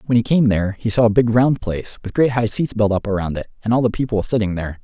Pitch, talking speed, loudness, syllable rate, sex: 110 Hz, 300 wpm, -18 LUFS, 6.8 syllables/s, male